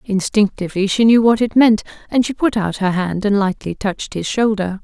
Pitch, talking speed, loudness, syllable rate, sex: 205 Hz, 210 wpm, -16 LUFS, 5.4 syllables/s, female